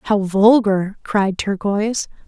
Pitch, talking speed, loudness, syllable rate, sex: 205 Hz, 105 wpm, -17 LUFS, 3.5 syllables/s, female